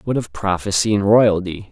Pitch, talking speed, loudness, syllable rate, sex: 100 Hz, 175 wpm, -17 LUFS, 5.0 syllables/s, male